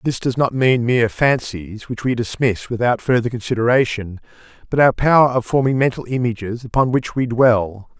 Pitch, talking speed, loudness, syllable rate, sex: 120 Hz, 175 wpm, -18 LUFS, 5.2 syllables/s, male